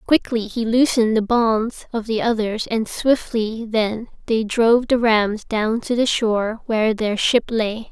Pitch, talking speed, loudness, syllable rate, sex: 225 Hz, 175 wpm, -19 LUFS, 4.2 syllables/s, female